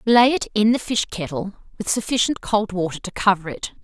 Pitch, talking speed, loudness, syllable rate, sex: 210 Hz, 205 wpm, -21 LUFS, 5.3 syllables/s, female